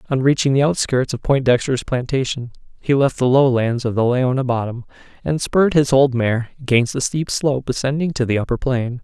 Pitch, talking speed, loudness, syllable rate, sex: 130 Hz, 200 wpm, -18 LUFS, 5.4 syllables/s, male